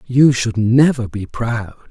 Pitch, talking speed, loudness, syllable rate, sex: 120 Hz, 160 wpm, -16 LUFS, 3.5 syllables/s, male